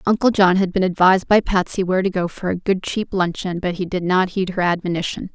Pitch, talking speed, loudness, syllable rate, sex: 185 Hz, 245 wpm, -19 LUFS, 6.0 syllables/s, female